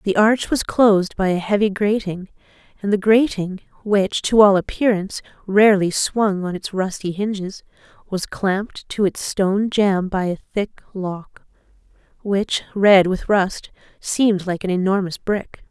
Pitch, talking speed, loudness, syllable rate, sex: 195 Hz, 155 wpm, -19 LUFS, 4.4 syllables/s, female